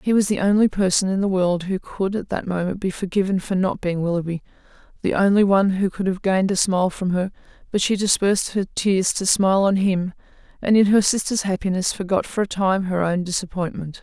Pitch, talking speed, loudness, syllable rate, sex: 190 Hz, 220 wpm, -21 LUFS, 5.8 syllables/s, female